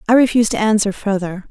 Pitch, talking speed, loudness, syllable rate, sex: 210 Hz, 200 wpm, -16 LUFS, 6.8 syllables/s, female